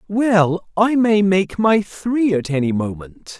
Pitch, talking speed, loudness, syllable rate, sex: 190 Hz, 160 wpm, -17 LUFS, 3.5 syllables/s, male